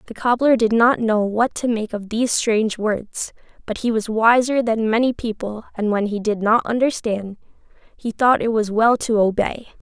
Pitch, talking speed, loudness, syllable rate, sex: 225 Hz, 195 wpm, -19 LUFS, 4.8 syllables/s, female